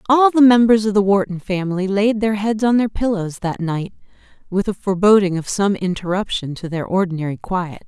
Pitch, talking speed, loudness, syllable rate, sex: 195 Hz, 190 wpm, -18 LUFS, 5.5 syllables/s, female